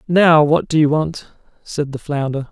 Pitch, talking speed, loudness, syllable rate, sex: 150 Hz, 190 wpm, -16 LUFS, 4.6 syllables/s, male